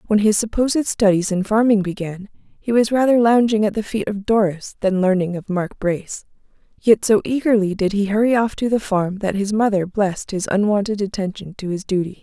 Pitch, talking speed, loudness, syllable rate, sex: 205 Hz, 200 wpm, -19 LUFS, 5.5 syllables/s, female